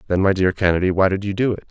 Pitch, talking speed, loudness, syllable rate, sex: 95 Hz, 315 wpm, -19 LUFS, 7.4 syllables/s, male